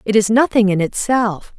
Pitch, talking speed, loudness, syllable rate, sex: 215 Hz, 190 wpm, -16 LUFS, 4.8 syllables/s, female